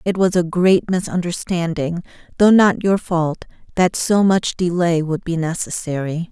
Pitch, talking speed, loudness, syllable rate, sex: 175 Hz, 150 wpm, -18 LUFS, 4.3 syllables/s, female